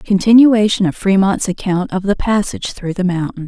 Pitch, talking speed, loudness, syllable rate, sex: 195 Hz, 175 wpm, -15 LUFS, 5.3 syllables/s, female